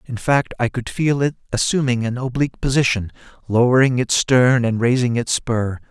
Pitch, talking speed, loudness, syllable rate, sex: 125 Hz, 175 wpm, -18 LUFS, 5.1 syllables/s, male